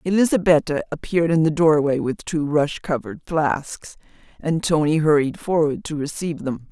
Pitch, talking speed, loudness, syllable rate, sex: 155 Hz, 150 wpm, -20 LUFS, 5.2 syllables/s, female